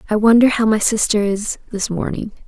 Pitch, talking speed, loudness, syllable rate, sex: 215 Hz, 195 wpm, -16 LUFS, 5.5 syllables/s, female